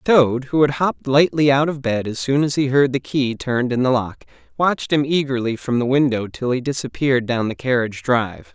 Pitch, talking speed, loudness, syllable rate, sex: 130 Hz, 230 wpm, -19 LUFS, 5.7 syllables/s, male